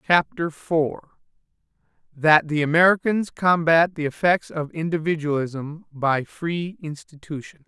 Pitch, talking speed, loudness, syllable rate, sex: 160 Hz, 100 wpm, -21 LUFS, 4.1 syllables/s, male